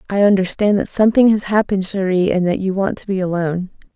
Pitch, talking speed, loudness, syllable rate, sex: 195 Hz, 210 wpm, -17 LUFS, 6.5 syllables/s, female